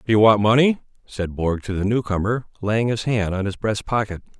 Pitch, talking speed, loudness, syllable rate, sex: 110 Hz, 220 wpm, -21 LUFS, 5.4 syllables/s, male